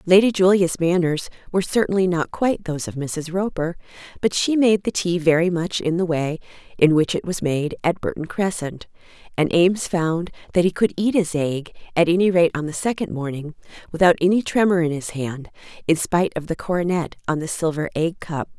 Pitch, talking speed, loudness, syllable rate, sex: 170 Hz, 195 wpm, -21 LUFS, 5.5 syllables/s, female